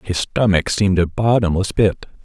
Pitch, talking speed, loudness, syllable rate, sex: 100 Hz, 160 wpm, -17 LUFS, 5.0 syllables/s, male